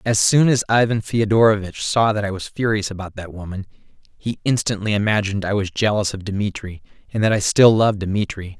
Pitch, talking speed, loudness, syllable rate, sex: 105 Hz, 190 wpm, -19 LUFS, 5.3 syllables/s, male